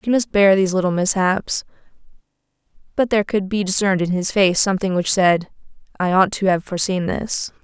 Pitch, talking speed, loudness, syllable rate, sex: 190 Hz, 180 wpm, -18 LUFS, 5.8 syllables/s, female